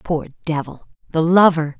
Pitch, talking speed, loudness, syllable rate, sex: 160 Hz, 100 wpm, -18 LUFS, 4.8 syllables/s, female